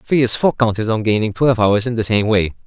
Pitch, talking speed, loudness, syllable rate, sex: 110 Hz, 245 wpm, -16 LUFS, 6.1 syllables/s, male